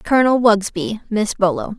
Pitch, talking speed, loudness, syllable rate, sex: 220 Hz, 100 wpm, -17 LUFS, 4.9 syllables/s, female